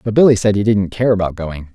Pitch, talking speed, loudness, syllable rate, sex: 100 Hz, 275 wpm, -15 LUFS, 6.2 syllables/s, male